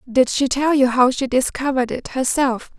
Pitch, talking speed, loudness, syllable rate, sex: 260 Hz, 195 wpm, -18 LUFS, 5.0 syllables/s, female